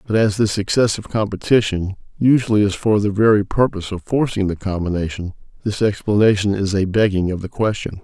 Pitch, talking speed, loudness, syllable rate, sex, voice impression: 105 Hz, 170 wpm, -18 LUFS, 5.8 syllables/s, male, very masculine, middle-aged, thick, cool, intellectual, slightly calm